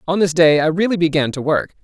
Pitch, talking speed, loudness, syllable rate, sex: 160 Hz, 260 wpm, -16 LUFS, 6.1 syllables/s, male